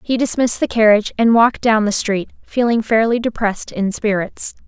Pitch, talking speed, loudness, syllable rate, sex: 220 Hz, 180 wpm, -16 LUFS, 5.5 syllables/s, female